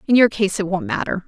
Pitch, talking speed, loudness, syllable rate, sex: 200 Hz, 285 wpm, -19 LUFS, 6.3 syllables/s, female